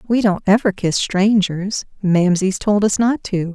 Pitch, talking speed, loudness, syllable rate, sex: 195 Hz, 150 wpm, -17 LUFS, 4.1 syllables/s, female